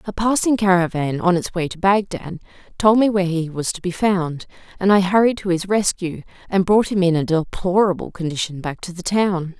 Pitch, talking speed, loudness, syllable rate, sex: 185 Hz, 205 wpm, -19 LUFS, 5.3 syllables/s, female